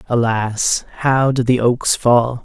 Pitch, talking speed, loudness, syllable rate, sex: 120 Hz, 150 wpm, -16 LUFS, 3.4 syllables/s, male